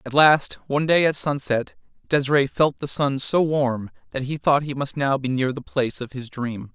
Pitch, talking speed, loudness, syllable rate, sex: 140 Hz, 220 wpm, -22 LUFS, 5.0 syllables/s, male